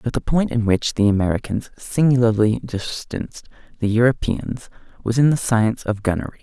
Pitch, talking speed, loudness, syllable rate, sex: 115 Hz, 160 wpm, -20 LUFS, 5.5 syllables/s, male